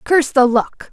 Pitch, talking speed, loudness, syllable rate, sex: 270 Hz, 195 wpm, -15 LUFS, 4.9 syllables/s, female